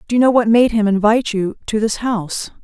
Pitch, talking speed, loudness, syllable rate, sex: 220 Hz, 250 wpm, -16 LUFS, 6.1 syllables/s, female